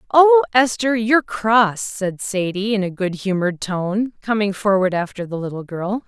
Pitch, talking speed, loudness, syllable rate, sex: 205 Hz, 170 wpm, -19 LUFS, 4.6 syllables/s, female